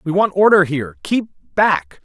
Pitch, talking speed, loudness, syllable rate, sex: 165 Hz, 145 wpm, -16 LUFS, 4.3 syllables/s, male